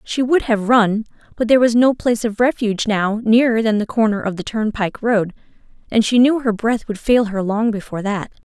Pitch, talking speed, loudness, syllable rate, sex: 220 Hz, 220 wpm, -17 LUFS, 5.6 syllables/s, female